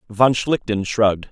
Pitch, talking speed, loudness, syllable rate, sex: 110 Hz, 135 wpm, -19 LUFS, 4.4 syllables/s, male